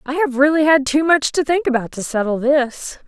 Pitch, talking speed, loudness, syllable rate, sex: 280 Hz, 235 wpm, -17 LUFS, 5.2 syllables/s, female